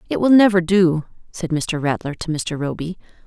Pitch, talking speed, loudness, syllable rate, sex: 170 Hz, 185 wpm, -18 LUFS, 5.1 syllables/s, female